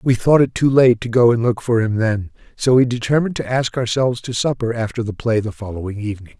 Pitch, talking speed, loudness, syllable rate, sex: 120 Hz, 245 wpm, -18 LUFS, 6.1 syllables/s, male